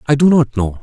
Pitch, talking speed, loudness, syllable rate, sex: 125 Hz, 290 wpm, -13 LUFS, 5.8 syllables/s, male